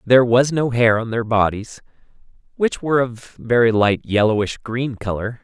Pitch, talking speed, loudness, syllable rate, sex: 115 Hz, 175 wpm, -18 LUFS, 5.1 syllables/s, male